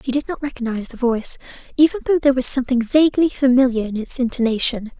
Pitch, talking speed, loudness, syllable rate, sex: 255 Hz, 190 wpm, -18 LUFS, 7.1 syllables/s, female